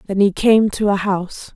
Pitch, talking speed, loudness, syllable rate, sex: 200 Hz, 230 wpm, -16 LUFS, 5.1 syllables/s, female